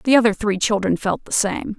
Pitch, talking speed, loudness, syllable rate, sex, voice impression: 215 Hz, 235 wpm, -19 LUFS, 5.4 syllables/s, female, very feminine, very young, very thin, very tensed, very powerful, bright, very hard, very clear, very fluent, raspy, very cute, slightly cool, intellectual, very refreshing, slightly sincere, slightly calm, friendly, reassuring, very unique, slightly elegant, very wild, sweet, very lively, very strict, intense, very sharp, very light